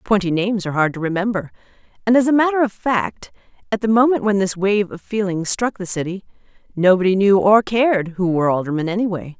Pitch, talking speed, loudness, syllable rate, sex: 200 Hz, 200 wpm, -18 LUFS, 6.1 syllables/s, female